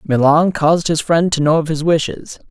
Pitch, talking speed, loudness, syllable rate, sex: 160 Hz, 215 wpm, -15 LUFS, 5.2 syllables/s, male